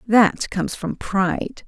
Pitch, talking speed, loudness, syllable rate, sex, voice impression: 205 Hz, 145 wpm, -21 LUFS, 3.9 syllables/s, female, feminine, adult-like, slightly muffled, slightly intellectual, slightly calm, elegant